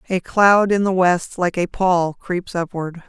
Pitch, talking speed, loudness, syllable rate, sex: 180 Hz, 195 wpm, -18 LUFS, 3.8 syllables/s, female